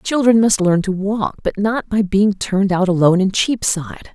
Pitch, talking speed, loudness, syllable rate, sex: 200 Hz, 205 wpm, -16 LUFS, 5.0 syllables/s, female